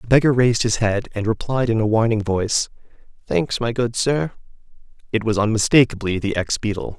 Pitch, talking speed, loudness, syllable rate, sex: 115 Hz, 180 wpm, -20 LUFS, 5.6 syllables/s, male